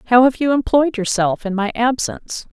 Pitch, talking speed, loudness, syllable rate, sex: 235 Hz, 185 wpm, -17 LUFS, 5.3 syllables/s, female